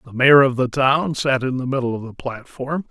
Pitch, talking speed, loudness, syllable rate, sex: 130 Hz, 250 wpm, -18 LUFS, 5.2 syllables/s, male